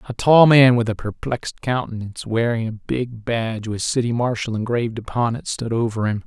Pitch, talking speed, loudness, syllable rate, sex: 115 Hz, 190 wpm, -20 LUFS, 5.4 syllables/s, male